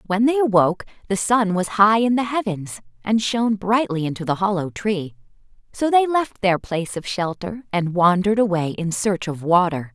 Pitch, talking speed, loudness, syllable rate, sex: 200 Hz, 185 wpm, -20 LUFS, 5.1 syllables/s, female